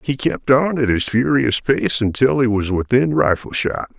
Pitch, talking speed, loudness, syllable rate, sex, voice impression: 125 Hz, 195 wpm, -17 LUFS, 4.5 syllables/s, male, very masculine, very adult-like, old, very thick, tensed, very powerful, slightly bright, very soft, muffled, raspy, very cool, intellectual, sincere, very calm, very mature, friendly, reassuring, very unique, elegant, very wild, sweet, lively, strict, slightly intense